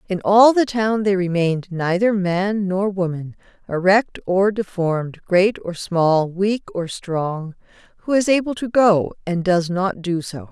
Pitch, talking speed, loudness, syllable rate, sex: 190 Hz, 165 wpm, -19 LUFS, 4.1 syllables/s, female